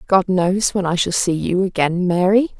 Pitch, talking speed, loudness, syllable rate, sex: 185 Hz, 210 wpm, -18 LUFS, 4.7 syllables/s, female